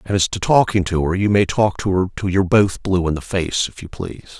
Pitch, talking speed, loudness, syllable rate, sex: 95 Hz, 285 wpm, -18 LUFS, 5.7 syllables/s, male